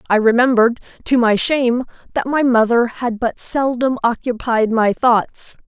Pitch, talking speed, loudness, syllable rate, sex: 240 Hz, 150 wpm, -16 LUFS, 4.6 syllables/s, female